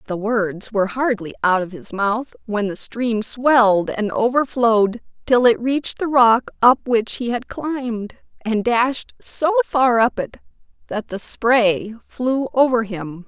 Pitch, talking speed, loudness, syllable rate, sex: 230 Hz, 165 wpm, -19 LUFS, 3.9 syllables/s, female